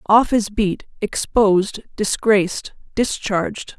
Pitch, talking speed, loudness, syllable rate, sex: 205 Hz, 95 wpm, -19 LUFS, 3.7 syllables/s, female